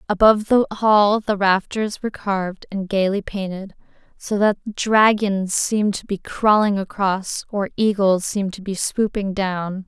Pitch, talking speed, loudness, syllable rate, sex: 200 Hz, 150 wpm, -20 LUFS, 4.4 syllables/s, female